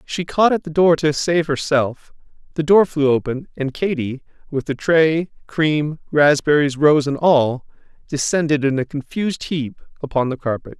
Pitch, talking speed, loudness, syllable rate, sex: 150 Hz, 165 wpm, -18 LUFS, 4.5 syllables/s, male